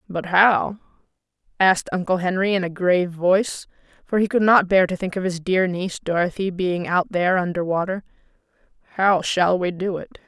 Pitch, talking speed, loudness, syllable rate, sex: 185 Hz, 180 wpm, -20 LUFS, 5.4 syllables/s, female